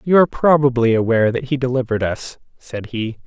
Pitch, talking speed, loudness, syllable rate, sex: 125 Hz, 185 wpm, -17 LUFS, 6.1 syllables/s, male